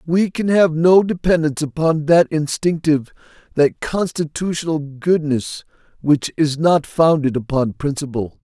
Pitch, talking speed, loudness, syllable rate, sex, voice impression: 155 Hz, 120 wpm, -18 LUFS, 4.5 syllables/s, male, masculine, very adult-like, slightly thick, slightly wild